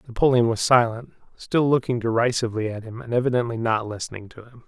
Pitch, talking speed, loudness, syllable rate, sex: 115 Hz, 180 wpm, -22 LUFS, 6.3 syllables/s, male